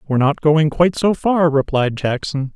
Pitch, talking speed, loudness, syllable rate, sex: 150 Hz, 190 wpm, -17 LUFS, 5.0 syllables/s, male